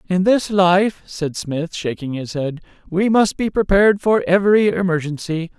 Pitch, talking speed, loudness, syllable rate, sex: 180 Hz, 160 wpm, -18 LUFS, 4.6 syllables/s, male